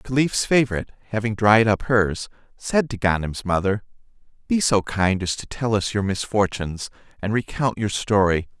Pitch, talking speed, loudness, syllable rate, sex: 105 Hz, 165 wpm, -22 LUFS, 5.1 syllables/s, male